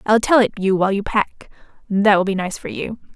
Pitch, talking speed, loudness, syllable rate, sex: 205 Hz, 230 wpm, -18 LUFS, 5.7 syllables/s, female